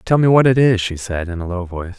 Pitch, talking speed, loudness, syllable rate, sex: 105 Hz, 330 wpm, -16 LUFS, 6.4 syllables/s, male